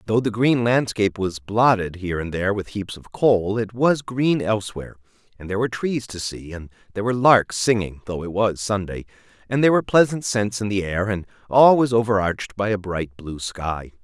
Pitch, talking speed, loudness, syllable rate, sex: 105 Hz, 215 wpm, -21 LUFS, 5.4 syllables/s, male